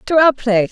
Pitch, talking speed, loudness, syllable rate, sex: 245 Hz, 250 wpm, -14 LUFS, 6.8 syllables/s, female